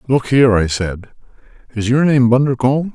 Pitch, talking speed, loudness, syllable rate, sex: 125 Hz, 165 wpm, -15 LUFS, 5.7 syllables/s, male